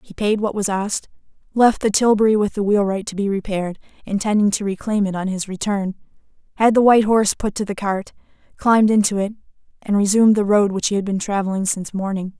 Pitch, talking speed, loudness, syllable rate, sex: 205 Hz, 210 wpm, -19 LUFS, 6.3 syllables/s, female